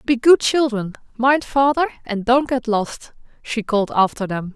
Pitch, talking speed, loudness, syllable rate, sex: 240 Hz, 170 wpm, -18 LUFS, 4.5 syllables/s, female